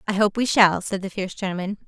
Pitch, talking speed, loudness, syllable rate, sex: 200 Hz, 255 wpm, -22 LUFS, 6.7 syllables/s, female